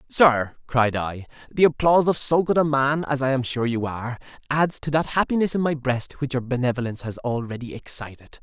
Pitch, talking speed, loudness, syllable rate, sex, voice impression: 135 Hz, 205 wpm, -23 LUFS, 5.7 syllables/s, male, masculine, adult-like, tensed, powerful, bright, clear, fluent, intellectual, friendly, slightly wild, lively, slightly intense